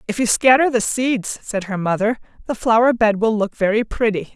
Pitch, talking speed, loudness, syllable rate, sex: 220 Hz, 205 wpm, -18 LUFS, 5.1 syllables/s, female